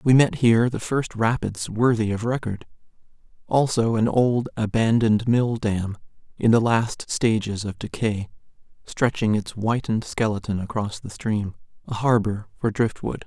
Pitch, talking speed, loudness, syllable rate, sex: 110 Hz, 145 wpm, -23 LUFS, 4.6 syllables/s, male